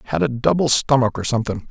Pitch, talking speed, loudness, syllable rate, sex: 120 Hz, 210 wpm, -19 LUFS, 6.8 syllables/s, male